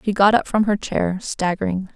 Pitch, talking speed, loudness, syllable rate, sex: 195 Hz, 215 wpm, -20 LUFS, 5.0 syllables/s, female